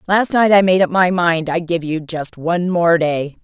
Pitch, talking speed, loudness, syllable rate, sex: 175 Hz, 245 wpm, -16 LUFS, 4.6 syllables/s, female